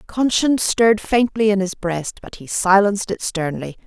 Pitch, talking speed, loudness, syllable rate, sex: 200 Hz, 170 wpm, -18 LUFS, 5.0 syllables/s, female